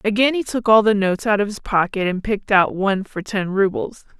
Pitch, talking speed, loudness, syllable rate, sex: 205 Hz, 245 wpm, -19 LUFS, 5.8 syllables/s, female